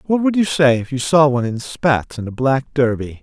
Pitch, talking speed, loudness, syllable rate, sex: 135 Hz, 260 wpm, -17 LUFS, 5.2 syllables/s, male